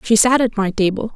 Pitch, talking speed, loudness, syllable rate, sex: 215 Hz, 260 wpm, -16 LUFS, 5.8 syllables/s, female